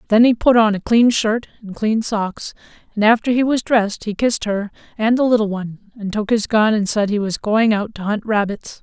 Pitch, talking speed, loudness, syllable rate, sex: 215 Hz, 240 wpm, -17 LUFS, 5.3 syllables/s, female